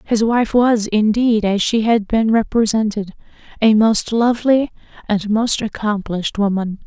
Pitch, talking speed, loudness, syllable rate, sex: 220 Hz, 140 wpm, -16 LUFS, 4.4 syllables/s, female